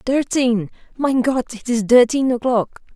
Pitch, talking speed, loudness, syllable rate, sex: 245 Hz, 120 wpm, -18 LUFS, 4.1 syllables/s, female